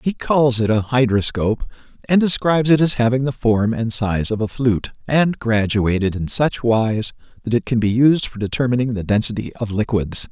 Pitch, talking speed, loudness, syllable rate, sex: 120 Hz, 190 wpm, -18 LUFS, 5.1 syllables/s, male